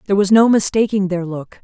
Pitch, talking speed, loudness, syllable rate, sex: 195 Hz, 220 wpm, -15 LUFS, 6.1 syllables/s, female